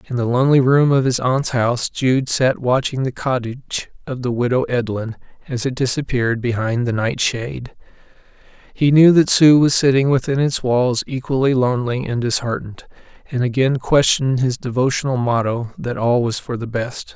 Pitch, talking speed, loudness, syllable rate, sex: 125 Hz, 170 wpm, -18 LUFS, 5.2 syllables/s, male